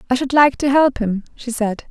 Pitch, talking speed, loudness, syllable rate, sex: 250 Hz, 250 wpm, -17 LUFS, 5.1 syllables/s, female